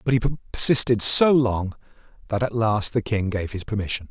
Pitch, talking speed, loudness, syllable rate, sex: 115 Hz, 190 wpm, -21 LUFS, 5.4 syllables/s, male